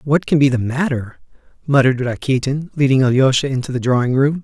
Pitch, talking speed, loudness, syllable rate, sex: 135 Hz, 175 wpm, -17 LUFS, 6.0 syllables/s, male